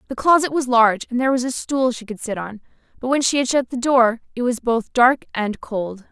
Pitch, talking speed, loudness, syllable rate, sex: 245 Hz, 255 wpm, -19 LUFS, 5.5 syllables/s, female